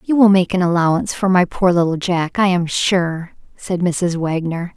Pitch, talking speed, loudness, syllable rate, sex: 180 Hz, 190 wpm, -17 LUFS, 4.5 syllables/s, female